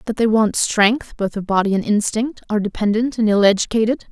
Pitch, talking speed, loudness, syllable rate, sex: 215 Hz, 205 wpm, -18 LUFS, 5.7 syllables/s, female